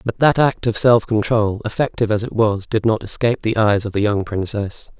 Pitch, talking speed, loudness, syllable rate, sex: 110 Hz, 230 wpm, -18 LUFS, 5.4 syllables/s, male